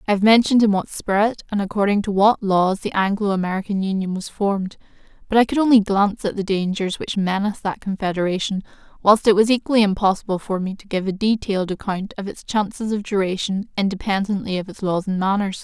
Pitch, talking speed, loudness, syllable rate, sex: 200 Hz, 200 wpm, -20 LUFS, 6.1 syllables/s, female